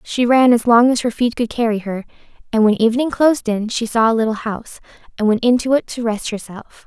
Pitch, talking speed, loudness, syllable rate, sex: 230 Hz, 235 wpm, -16 LUFS, 5.9 syllables/s, female